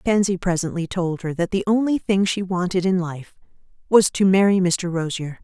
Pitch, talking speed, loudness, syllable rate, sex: 185 Hz, 190 wpm, -20 LUFS, 5.1 syllables/s, female